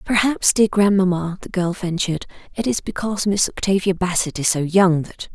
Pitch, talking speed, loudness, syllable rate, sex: 190 Hz, 180 wpm, -19 LUFS, 5.3 syllables/s, female